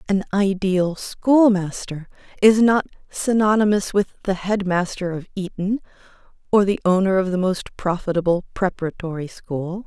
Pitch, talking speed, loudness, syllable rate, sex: 190 Hz, 120 wpm, -20 LUFS, 4.6 syllables/s, female